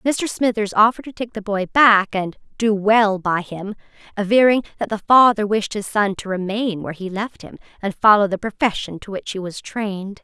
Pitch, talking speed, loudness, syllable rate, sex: 205 Hz, 205 wpm, -19 LUFS, 5.2 syllables/s, female